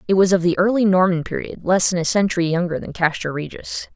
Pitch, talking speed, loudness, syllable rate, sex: 180 Hz, 225 wpm, -19 LUFS, 6.2 syllables/s, female